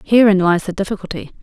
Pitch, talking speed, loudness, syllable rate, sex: 190 Hz, 170 wpm, -16 LUFS, 6.5 syllables/s, female